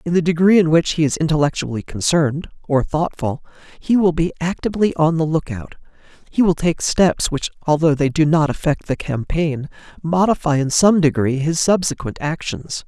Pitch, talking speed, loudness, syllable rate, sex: 160 Hz, 170 wpm, -18 LUFS, 5.1 syllables/s, male